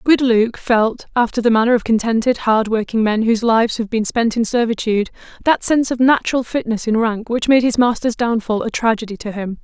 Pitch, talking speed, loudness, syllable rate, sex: 230 Hz, 205 wpm, -17 LUFS, 5.7 syllables/s, female